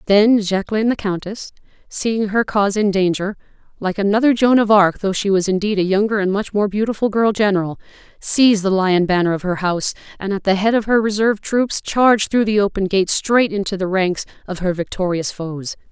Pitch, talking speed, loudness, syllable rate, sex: 200 Hz, 195 wpm, -17 LUFS, 5.6 syllables/s, female